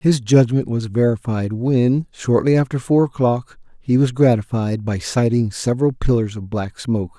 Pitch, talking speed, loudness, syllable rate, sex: 120 Hz, 160 wpm, -18 LUFS, 4.7 syllables/s, male